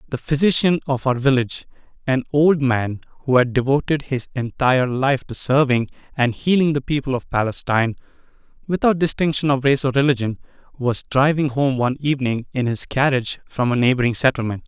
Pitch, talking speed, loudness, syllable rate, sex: 135 Hz, 165 wpm, -19 LUFS, 5.7 syllables/s, male